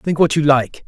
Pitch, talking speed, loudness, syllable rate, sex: 145 Hz, 275 wpm, -15 LUFS, 4.8 syllables/s, male